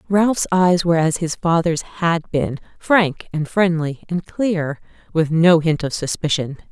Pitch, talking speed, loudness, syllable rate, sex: 165 Hz, 150 wpm, -19 LUFS, 4.1 syllables/s, female